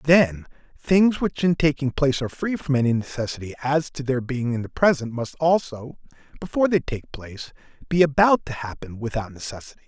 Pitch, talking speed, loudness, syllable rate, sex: 140 Hz, 180 wpm, -22 LUFS, 5.7 syllables/s, male